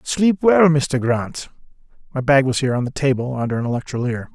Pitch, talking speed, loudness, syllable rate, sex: 135 Hz, 195 wpm, -19 LUFS, 5.9 syllables/s, male